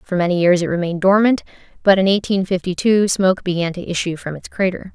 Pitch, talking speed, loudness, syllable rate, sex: 185 Hz, 220 wpm, -17 LUFS, 6.2 syllables/s, female